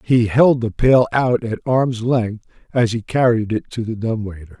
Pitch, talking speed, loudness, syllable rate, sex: 115 Hz, 210 wpm, -18 LUFS, 4.4 syllables/s, male